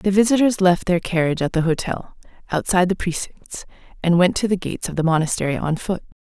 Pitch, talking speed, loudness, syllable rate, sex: 180 Hz, 200 wpm, -20 LUFS, 6.2 syllables/s, female